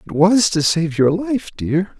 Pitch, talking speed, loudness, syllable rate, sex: 180 Hz, 210 wpm, -17 LUFS, 3.9 syllables/s, male